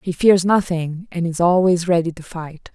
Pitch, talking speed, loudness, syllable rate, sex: 175 Hz, 195 wpm, -18 LUFS, 4.6 syllables/s, female